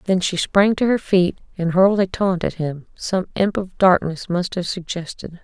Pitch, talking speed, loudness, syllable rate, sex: 180 Hz, 210 wpm, -20 LUFS, 4.6 syllables/s, female